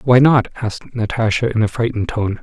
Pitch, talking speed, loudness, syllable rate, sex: 115 Hz, 200 wpm, -17 LUFS, 5.9 syllables/s, male